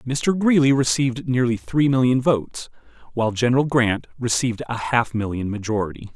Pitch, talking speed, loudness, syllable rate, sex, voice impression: 120 Hz, 145 wpm, -21 LUFS, 5.4 syllables/s, male, very masculine, very adult-like, slightly old, thick, slightly tensed, powerful, bright, soft, clear, fluent, cool, very intellectual, slightly refreshing, very sincere, calm, very friendly, very reassuring, unique, elegant, slightly wild, sweet, lively, very kind, slightly intense, slightly modest